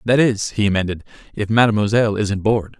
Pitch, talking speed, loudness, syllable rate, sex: 105 Hz, 170 wpm, -18 LUFS, 6.3 syllables/s, male